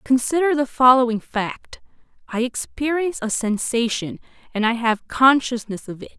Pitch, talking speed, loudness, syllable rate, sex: 245 Hz, 135 wpm, -20 LUFS, 4.8 syllables/s, female